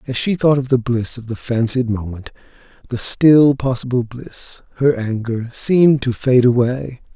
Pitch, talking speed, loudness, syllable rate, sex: 125 Hz, 170 wpm, -16 LUFS, 4.4 syllables/s, male